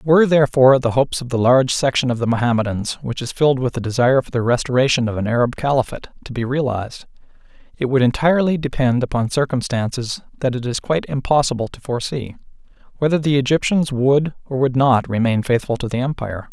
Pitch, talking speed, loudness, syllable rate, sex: 130 Hz, 185 wpm, -18 LUFS, 6.5 syllables/s, male